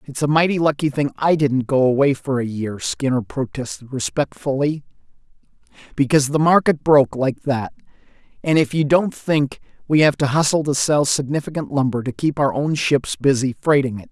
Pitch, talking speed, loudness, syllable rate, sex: 140 Hz, 170 wpm, -19 LUFS, 5.1 syllables/s, male